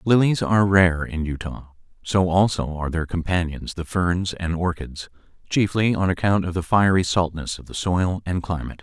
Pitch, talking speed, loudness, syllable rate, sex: 90 Hz, 175 wpm, -22 LUFS, 5.0 syllables/s, male